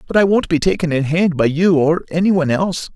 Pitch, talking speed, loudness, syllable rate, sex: 165 Hz, 265 wpm, -16 LUFS, 6.3 syllables/s, male